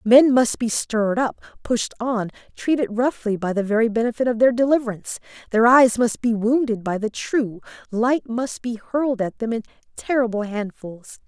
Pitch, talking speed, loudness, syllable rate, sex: 230 Hz, 175 wpm, -21 LUFS, 5.0 syllables/s, female